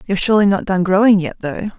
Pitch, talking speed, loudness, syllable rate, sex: 195 Hz, 235 wpm, -15 LUFS, 7.1 syllables/s, female